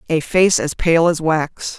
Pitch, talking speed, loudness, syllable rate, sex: 165 Hz, 200 wpm, -16 LUFS, 3.7 syllables/s, female